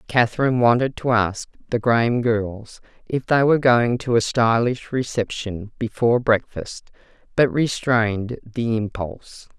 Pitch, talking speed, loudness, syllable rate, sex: 115 Hz, 130 wpm, -20 LUFS, 4.5 syllables/s, female